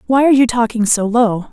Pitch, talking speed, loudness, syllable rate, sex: 235 Hz, 235 wpm, -14 LUFS, 5.9 syllables/s, female